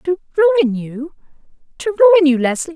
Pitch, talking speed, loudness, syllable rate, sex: 305 Hz, 130 wpm, -15 LUFS, 5.3 syllables/s, female